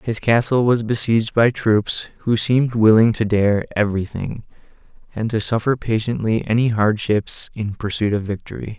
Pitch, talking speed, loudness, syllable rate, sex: 110 Hz, 155 wpm, -19 LUFS, 4.9 syllables/s, male